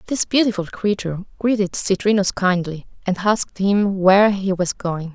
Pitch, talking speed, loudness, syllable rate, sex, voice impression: 195 Hz, 150 wpm, -19 LUFS, 5.1 syllables/s, female, very feminine, young, slightly adult-like, thin, slightly relaxed, slightly weak, dark, hard, clear, slightly fluent, slightly raspy, cool, intellectual, refreshing, slightly sincere, calm, slightly friendly, reassuring, unique, wild, slightly sweet, slightly lively, kind, slightly modest